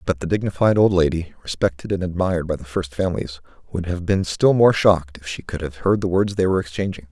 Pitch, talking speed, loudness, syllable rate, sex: 90 Hz, 235 wpm, -20 LUFS, 6.2 syllables/s, male